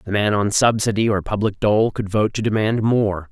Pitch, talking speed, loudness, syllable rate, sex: 105 Hz, 215 wpm, -19 LUFS, 5.1 syllables/s, male